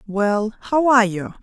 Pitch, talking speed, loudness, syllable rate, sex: 220 Hz, 170 wpm, -18 LUFS, 4.6 syllables/s, female